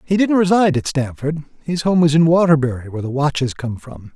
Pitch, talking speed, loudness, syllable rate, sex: 150 Hz, 215 wpm, -17 LUFS, 6.0 syllables/s, male